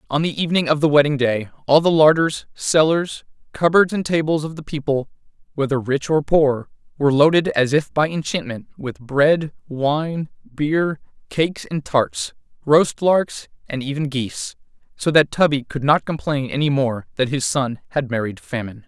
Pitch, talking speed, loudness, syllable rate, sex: 145 Hz, 170 wpm, -19 LUFS, 4.8 syllables/s, male